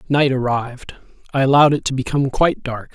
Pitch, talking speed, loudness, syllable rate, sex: 135 Hz, 185 wpm, -18 LUFS, 6.6 syllables/s, male